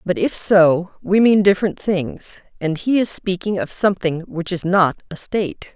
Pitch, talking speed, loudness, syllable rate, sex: 190 Hz, 190 wpm, -18 LUFS, 4.6 syllables/s, female